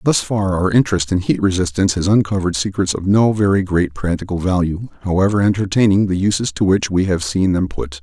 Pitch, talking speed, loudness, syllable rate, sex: 95 Hz, 200 wpm, -17 LUFS, 5.9 syllables/s, male